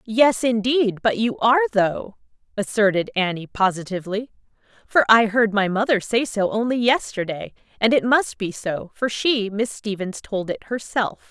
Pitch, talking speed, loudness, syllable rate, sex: 220 Hz, 160 wpm, -21 LUFS, 4.6 syllables/s, female